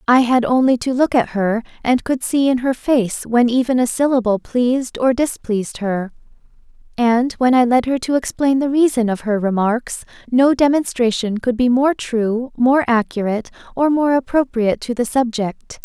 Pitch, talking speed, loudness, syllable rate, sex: 245 Hz, 180 wpm, -17 LUFS, 4.8 syllables/s, female